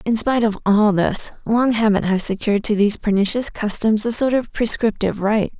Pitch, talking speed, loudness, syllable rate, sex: 215 Hz, 195 wpm, -18 LUFS, 5.6 syllables/s, female